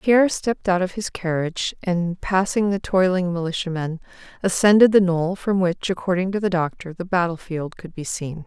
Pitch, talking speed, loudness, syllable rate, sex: 180 Hz, 175 wpm, -21 LUFS, 5.2 syllables/s, female